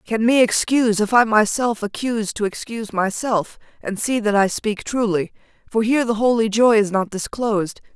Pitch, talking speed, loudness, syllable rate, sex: 220 Hz, 180 wpm, -19 LUFS, 5.2 syllables/s, female